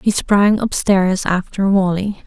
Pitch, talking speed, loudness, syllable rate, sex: 195 Hz, 130 wpm, -16 LUFS, 3.7 syllables/s, female